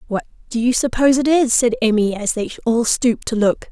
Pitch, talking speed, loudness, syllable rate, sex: 235 Hz, 225 wpm, -17 LUFS, 5.9 syllables/s, female